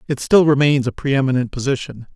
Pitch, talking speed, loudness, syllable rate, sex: 135 Hz, 165 wpm, -17 LUFS, 6.5 syllables/s, male